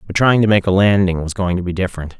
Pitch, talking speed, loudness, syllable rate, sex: 95 Hz, 300 wpm, -16 LUFS, 6.8 syllables/s, male